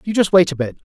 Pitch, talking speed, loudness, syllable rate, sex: 175 Hz, 335 wpm, -16 LUFS, 7.0 syllables/s, male